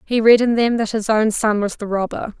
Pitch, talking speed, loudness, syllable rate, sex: 220 Hz, 275 wpm, -17 LUFS, 5.3 syllables/s, female